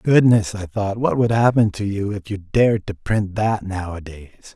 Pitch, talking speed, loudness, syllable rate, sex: 105 Hz, 200 wpm, -20 LUFS, 4.7 syllables/s, male